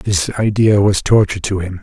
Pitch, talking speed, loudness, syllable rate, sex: 100 Hz, 195 wpm, -15 LUFS, 5.0 syllables/s, male